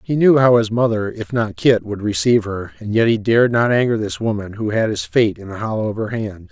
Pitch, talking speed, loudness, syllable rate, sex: 110 Hz, 265 wpm, -18 LUFS, 5.7 syllables/s, male